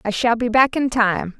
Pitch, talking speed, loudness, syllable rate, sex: 230 Hz, 260 wpm, -18 LUFS, 4.7 syllables/s, female